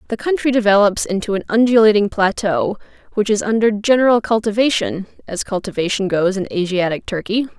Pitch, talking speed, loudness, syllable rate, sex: 210 Hz, 140 wpm, -17 LUFS, 5.7 syllables/s, female